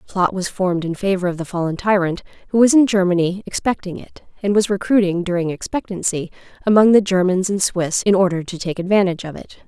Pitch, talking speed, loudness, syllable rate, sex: 190 Hz, 205 wpm, -18 LUFS, 6.1 syllables/s, female